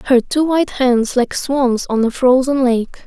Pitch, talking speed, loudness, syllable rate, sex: 255 Hz, 195 wpm, -15 LUFS, 4.3 syllables/s, female